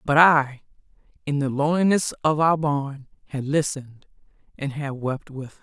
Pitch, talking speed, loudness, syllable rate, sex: 145 Hz, 160 wpm, -22 LUFS, 5.0 syllables/s, female